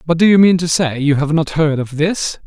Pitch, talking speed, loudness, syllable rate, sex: 160 Hz, 290 wpm, -14 LUFS, 5.2 syllables/s, male